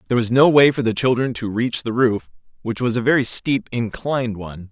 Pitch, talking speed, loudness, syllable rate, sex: 120 Hz, 230 wpm, -19 LUFS, 5.8 syllables/s, male